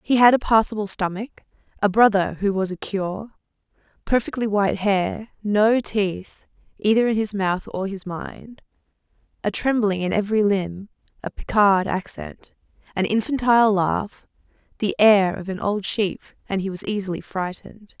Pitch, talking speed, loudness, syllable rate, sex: 205 Hz, 150 wpm, -21 LUFS, 4.6 syllables/s, female